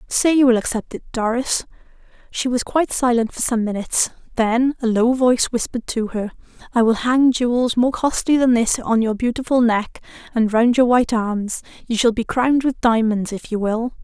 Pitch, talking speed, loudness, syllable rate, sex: 240 Hz, 195 wpm, -19 LUFS, 5.2 syllables/s, female